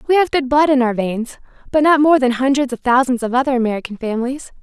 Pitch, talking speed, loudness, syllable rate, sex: 260 Hz, 235 wpm, -16 LUFS, 6.3 syllables/s, female